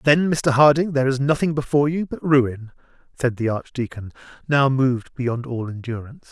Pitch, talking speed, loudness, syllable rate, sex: 135 Hz, 170 wpm, -21 LUFS, 5.4 syllables/s, male